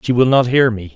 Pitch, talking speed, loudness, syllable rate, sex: 120 Hz, 315 wpm, -14 LUFS, 5.9 syllables/s, male